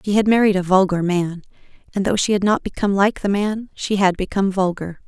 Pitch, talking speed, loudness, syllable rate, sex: 195 Hz, 225 wpm, -19 LUFS, 5.9 syllables/s, female